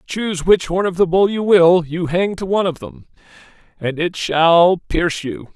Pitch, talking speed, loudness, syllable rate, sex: 175 Hz, 205 wpm, -16 LUFS, 4.9 syllables/s, male